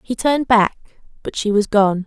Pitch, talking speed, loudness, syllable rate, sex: 220 Hz, 205 wpm, -17 LUFS, 4.6 syllables/s, female